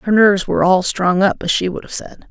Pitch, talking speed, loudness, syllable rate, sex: 190 Hz, 285 wpm, -15 LUFS, 6.0 syllables/s, female